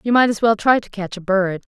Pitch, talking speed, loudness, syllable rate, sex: 205 Hz, 310 wpm, -18 LUFS, 5.7 syllables/s, female